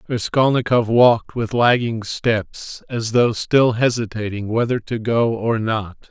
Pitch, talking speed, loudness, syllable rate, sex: 115 Hz, 140 wpm, -18 LUFS, 3.9 syllables/s, male